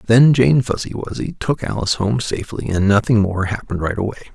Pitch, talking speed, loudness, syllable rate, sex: 110 Hz, 195 wpm, -18 LUFS, 6.1 syllables/s, male